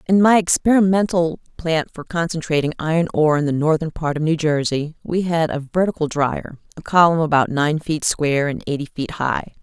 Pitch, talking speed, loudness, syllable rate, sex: 160 Hz, 185 wpm, -19 LUFS, 5.3 syllables/s, female